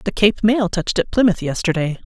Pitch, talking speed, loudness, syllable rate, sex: 190 Hz, 200 wpm, -18 LUFS, 5.9 syllables/s, female